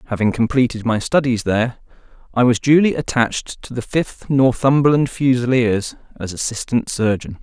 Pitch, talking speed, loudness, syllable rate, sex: 125 Hz, 135 wpm, -18 LUFS, 5.1 syllables/s, male